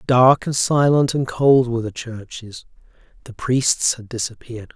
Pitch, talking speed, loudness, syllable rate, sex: 125 Hz, 150 wpm, -18 LUFS, 4.5 syllables/s, male